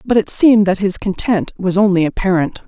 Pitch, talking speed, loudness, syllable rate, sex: 200 Hz, 200 wpm, -15 LUFS, 5.6 syllables/s, female